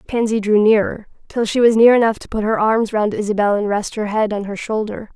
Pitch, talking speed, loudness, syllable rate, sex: 215 Hz, 245 wpm, -17 LUFS, 5.6 syllables/s, female